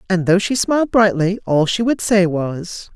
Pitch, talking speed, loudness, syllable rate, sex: 195 Hz, 205 wpm, -16 LUFS, 4.5 syllables/s, female